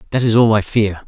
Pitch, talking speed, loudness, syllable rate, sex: 110 Hz, 280 wpm, -15 LUFS, 6.5 syllables/s, male